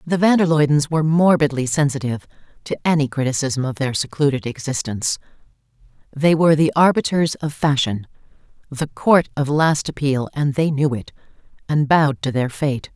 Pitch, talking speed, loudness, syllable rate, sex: 145 Hz, 155 wpm, -19 LUFS, 5.4 syllables/s, female